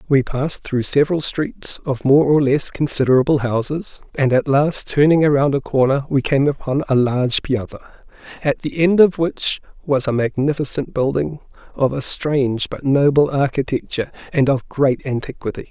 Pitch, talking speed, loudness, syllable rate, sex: 140 Hz, 165 wpm, -18 LUFS, 4.9 syllables/s, male